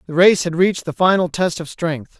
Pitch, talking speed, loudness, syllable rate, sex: 170 Hz, 245 wpm, -17 LUFS, 5.4 syllables/s, male